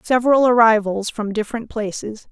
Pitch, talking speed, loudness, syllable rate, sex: 220 Hz, 130 wpm, -18 LUFS, 5.4 syllables/s, female